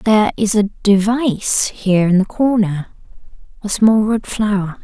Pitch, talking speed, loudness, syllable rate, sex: 205 Hz, 150 wpm, -16 LUFS, 4.5 syllables/s, female